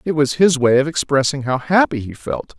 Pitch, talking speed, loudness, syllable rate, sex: 140 Hz, 230 wpm, -17 LUFS, 5.2 syllables/s, male